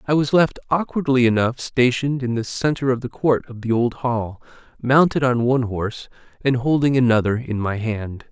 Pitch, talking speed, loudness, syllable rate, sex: 125 Hz, 190 wpm, -20 LUFS, 5.2 syllables/s, male